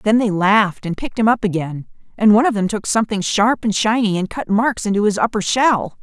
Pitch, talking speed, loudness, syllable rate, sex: 210 Hz, 240 wpm, -17 LUFS, 5.8 syllables/s, female